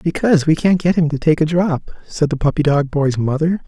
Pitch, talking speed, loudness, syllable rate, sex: 155 Hz, 245 wpm, -16 LUFS, 5.4 syllables/s, male